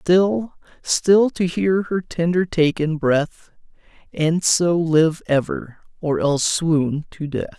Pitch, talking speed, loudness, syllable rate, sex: 165 Hz, 125 wpm, -19 LUFS, 3.3 syllables/s, male